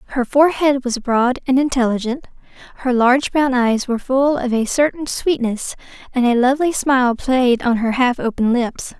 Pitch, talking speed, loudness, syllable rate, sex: 255 Hz, 175 wpm, -17 LUFS, 5.3 syllables/s, female